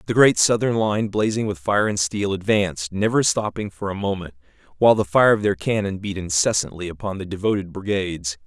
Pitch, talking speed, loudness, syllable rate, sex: 100 Hz, 190 wpm, -21 LUFS, 5.7 syllables/s, male